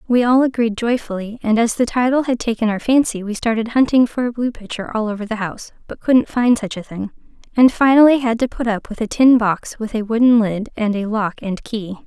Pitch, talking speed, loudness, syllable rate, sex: 225 Hz, 240 wpm, -17 LUFS, 5.7 syllables/s, female